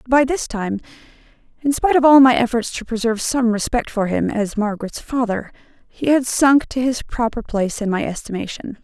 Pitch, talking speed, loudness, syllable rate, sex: 235 Hz, 190 wpm, -18 LUFS, 2.9 syllables/s, female